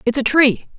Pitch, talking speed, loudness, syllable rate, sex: 250 Hz, 230 wpm, -15 LUFS, 5.0 syllables/s, female